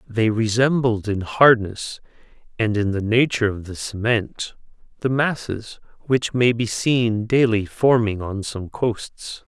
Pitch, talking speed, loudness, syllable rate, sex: 115 Hz, 140 wpm, -20 LUFS, 3.9 syllables/s, male